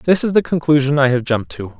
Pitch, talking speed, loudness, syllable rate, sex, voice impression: 135 Hz, 265 wpm, -16 LUFS, 6.4 syllables/s, male, masculine, middle-aged, tensed, powerful, slightly hard, raspy, cool, intellectual, sincere, slightly friendly, wild, lively, strict